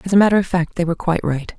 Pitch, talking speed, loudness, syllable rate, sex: 175 Hz, 340 wpm, -18 LUFS, 8.2 syllables/s, female